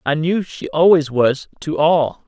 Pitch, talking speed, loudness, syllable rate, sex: 155 Hz, 185 wpm, -17 LUFS, 3.9 syllables/s, male